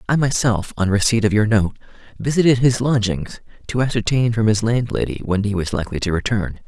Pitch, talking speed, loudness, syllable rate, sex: 110 Hz, 190 wpm, -19 LUFS, 5.7 syllables/s, male